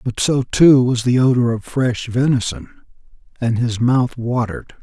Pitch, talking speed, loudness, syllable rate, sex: 125 Hz, 160 wpm, -17 LUFS, 4.4 syllables/s, male